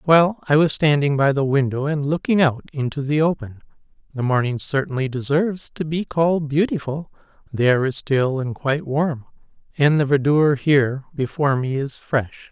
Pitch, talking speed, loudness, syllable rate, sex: 145 Hz, 175 wpm, -20 LUFS, 5.2 syllables/s, male